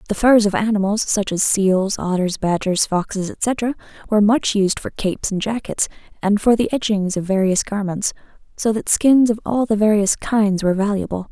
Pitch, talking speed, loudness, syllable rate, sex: 205 Hz, 185 wpm, -18 LUFS, 5.0 syllables/s, female